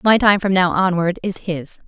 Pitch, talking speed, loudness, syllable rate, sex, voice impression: 185 Hz, 225 wpm, -17 LUFS, 4.8 syllables/s, female, very feminine, young, thin, slightly tensed, slightly powerful, bright, hard, very clear, very fluent, cute, very intellectual, very refreshing, very sincere, calm, friendly, reassuring, unique, very elegant, slightly wild, sweet, very lively, kind, slightly intense, slightly sharp